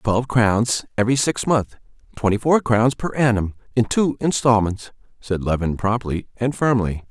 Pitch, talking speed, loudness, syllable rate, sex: 115 Hz, 150 wpm, -20 LUFS, 4.7 syllables/s, male